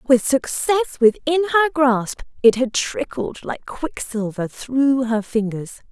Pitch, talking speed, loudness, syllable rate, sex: 260 Hz, 130 wpm, -20 LUFS, 4.0 syllables/s, female